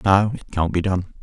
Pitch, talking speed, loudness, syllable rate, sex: 95 Hz, 245 wpm, -21 LUFS, 5.3 syllables/s, male